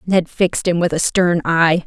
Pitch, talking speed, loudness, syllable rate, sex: 170 Hz, 225 wpm, -16 LUFS, 4.7 syllables/s, female